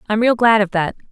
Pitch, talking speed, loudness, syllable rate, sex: 215 Hz, 270 wpm, -16 LUFS, 6.2 syllables/s, female